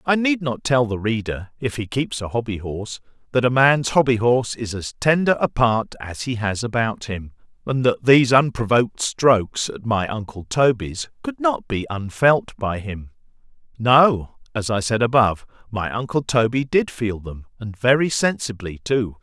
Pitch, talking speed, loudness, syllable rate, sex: 115 Hz, 170 wpm, -20 LUFS, 4.7 syllables/s, male